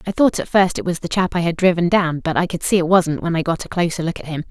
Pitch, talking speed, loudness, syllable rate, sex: 175 Hz, 345 wpm, -18 LUFS, 6.5 syllables/s, female